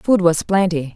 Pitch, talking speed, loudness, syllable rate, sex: 180 Hz, 190 wpm, -17 LUFS, 4.4 syllables/s, female